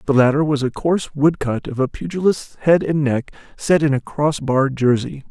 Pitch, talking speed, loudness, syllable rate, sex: 145 Hz, 215 wpm, -18 LUFS, 5.1 syllables/s, male